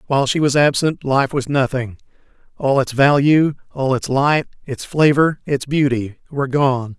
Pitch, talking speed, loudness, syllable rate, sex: 140 Hz, 165 wpm, -17 LUFS, 4.6 syllables/s, male